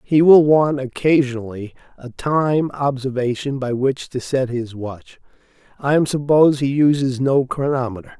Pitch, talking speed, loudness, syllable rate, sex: 135 Hz, 145 wpm, -18 LUFS, 3.3 syllables/s, male